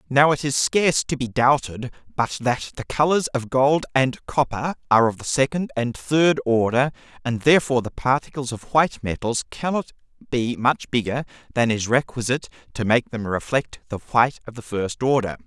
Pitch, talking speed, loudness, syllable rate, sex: 130 Hz, 180 wpm, -22 LUFS, 5.2 syllables/s, male